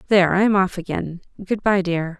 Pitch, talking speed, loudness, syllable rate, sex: 185 Hz, 220 wpm, -20 LUFS, 5.7 syllables/s, female